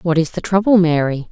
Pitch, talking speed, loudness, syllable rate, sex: 170 Hz, 230 wpm, -15 LUFS, 5.5 syllables/s, female